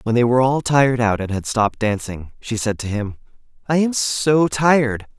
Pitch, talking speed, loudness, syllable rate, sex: 125 Hz, 210 wpm, -18 LUFS, 5.2 syllables/s, male